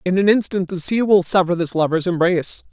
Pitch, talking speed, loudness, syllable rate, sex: 180 Hz, 220 wpm, -18 LUFS, 5.9 syllables/s, male